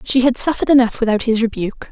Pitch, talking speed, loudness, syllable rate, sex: 235 Hz, 220 wpm, -16 LUFS, 7.2 syllables/s, female